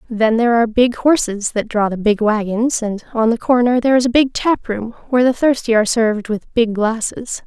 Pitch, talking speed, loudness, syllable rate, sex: 230 Hz, 215 wpm, -16 LUFS, 5.6 syllables/s, female